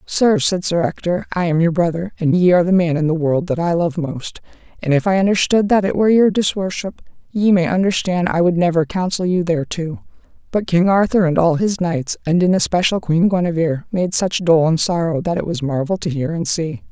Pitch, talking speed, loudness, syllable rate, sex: 180 Hz, 225 wpm, -17 LUFS, 5.5 syllables/s, female